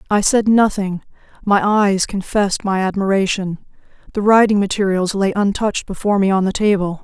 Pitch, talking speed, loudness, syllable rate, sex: 200 Hz, 155 wpm, -16 LUFS, 5.4 syllables/s, female